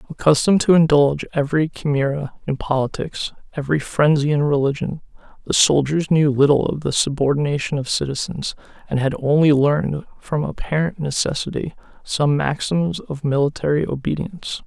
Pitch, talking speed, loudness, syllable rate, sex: 145 Hz, 130 wpm, -19 LUFS, 5.4 syllables/s, male